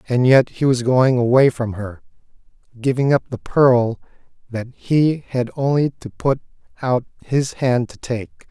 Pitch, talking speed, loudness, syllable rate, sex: 125 Hz, 160 wpm, -19 LUFS, 4.1 syllables/s, male